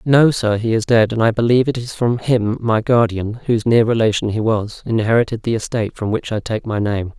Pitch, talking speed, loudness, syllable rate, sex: 115 Hz, 235 wpm, -17 LUFS, 5.6 syllables/s, male